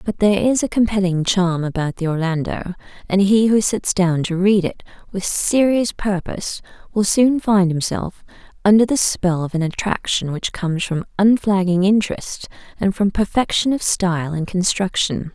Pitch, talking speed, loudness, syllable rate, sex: 190 Hz, 165 wpm, -18 LUFS, 4.8 syllables/s, female